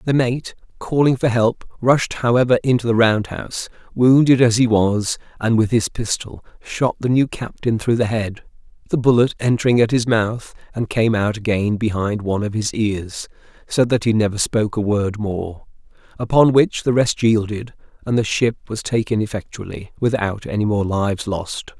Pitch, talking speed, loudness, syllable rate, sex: 115 Hz, 180 wpm, -18 LUFS, 4.9 syllables/s, male